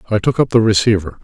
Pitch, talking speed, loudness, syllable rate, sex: 110 Hz, 245 wpm, -14 LUFS, 7.1 syllables/s, male